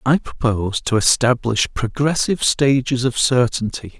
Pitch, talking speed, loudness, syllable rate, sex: 125 Hz, 120 wpm, -18 LUFS, 4.6 syllables/s, male